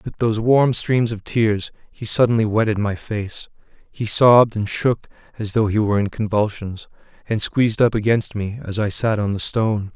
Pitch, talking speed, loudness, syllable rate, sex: 110 Hz, 195 wpm, -19 LUFS, 5.0 syllables/s, male